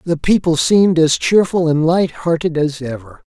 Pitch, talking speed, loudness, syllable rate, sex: 160 Hz, 165 wpm, -15 LUFS, 4.8 syllables/s, male